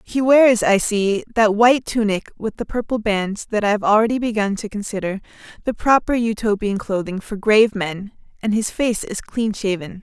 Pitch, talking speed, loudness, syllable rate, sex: 215 Hz, 185 wpm, -19 LUFS, 5.1 syllables/s, female